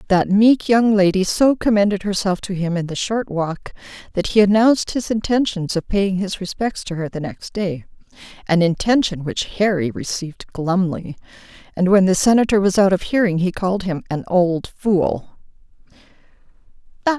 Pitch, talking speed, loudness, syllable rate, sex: 195 Hz, 165 wpm, -18 LUFS, 5.0 syllables/s, female